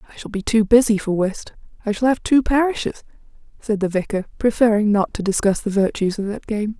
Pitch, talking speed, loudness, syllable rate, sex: 215 Hz, 210 wpm, -19 LUFS, 5.8 syllables/s, female